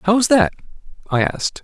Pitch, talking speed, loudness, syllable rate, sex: 195 Hz, 185 wpm, -17 LUFS, 5.6 syllables/s, male